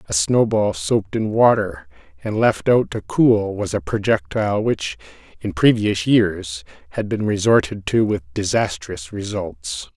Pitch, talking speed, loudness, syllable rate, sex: 110 Hz, 150 wpm, -19 LUFS, 4.1 syllables/s, male